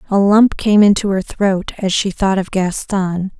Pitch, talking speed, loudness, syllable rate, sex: 195 Hz, 195 wpm, -15 LUFS, 4.2 syllables/s, female